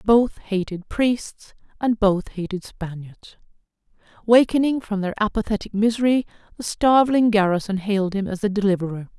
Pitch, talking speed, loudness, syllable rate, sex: 210 Hz, 130 wpm, -21 LUFS, 5.2 syllables/s, female